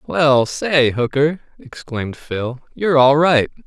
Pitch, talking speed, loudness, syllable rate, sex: 140 Hz, 130 wpm, -17 LUFS, 3.8 syllables/s, male